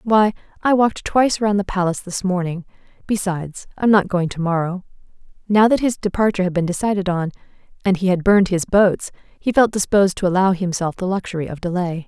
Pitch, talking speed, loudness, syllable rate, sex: 190 Hz, 195 wpm, -19 LUFS, 6.0 syllables/s, female